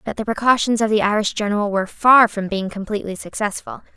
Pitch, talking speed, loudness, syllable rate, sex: 210 Hz, 195 wpm, -18 LUFS, 6.4 syllables/s, female